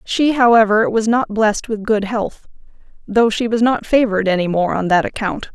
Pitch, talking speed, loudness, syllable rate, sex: 220 Hz, 195 wpm, -16 LUFS, 5.2 syllables/s, female